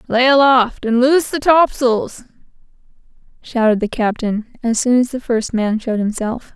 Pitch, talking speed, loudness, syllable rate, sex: 240 Hz, 155 wpm, -16 LUFS, 4.7 syllables/s, female